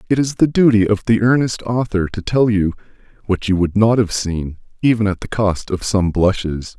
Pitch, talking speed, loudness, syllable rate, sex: 105 Hz, 205 wpm, -17 LUFS, 5.0 syllables/s, male